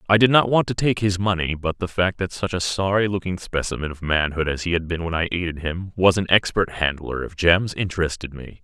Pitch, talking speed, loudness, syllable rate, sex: 90 Hz, 245 wpm, -21 LUFS, 5.6 syllables/s, male